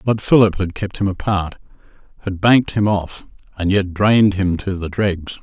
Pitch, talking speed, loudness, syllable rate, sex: 95 Hz, 190 wpm, -17 LUFS, 4.8 syllables/s, male